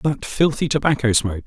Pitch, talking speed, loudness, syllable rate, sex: 130 Hz, 165 wpm, -19 LUFS, 6.0 syllables/s, male